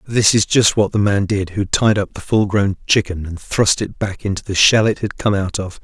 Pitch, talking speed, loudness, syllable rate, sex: 100 Hz, 270 wpm, -17 LUFS, 5.0 syllables/s, male